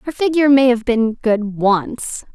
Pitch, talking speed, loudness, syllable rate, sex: 240 Hz, 180 wpm, -16 LUFS, 4.3 syllables/s, female